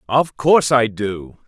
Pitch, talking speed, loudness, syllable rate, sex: 120 Hz, 160 wpm, -17 LUFS, 4.1 syllables/s, male